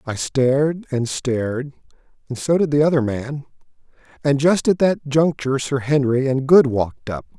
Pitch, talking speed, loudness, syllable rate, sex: 140 Hz, 170 wpm, -19 LUFS, 4.8 syllables/s, male